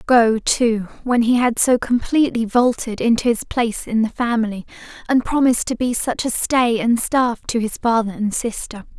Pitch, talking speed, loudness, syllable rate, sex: 235 Hz, 185 wpm, -18 LUFS, 5.0 syllables/s, female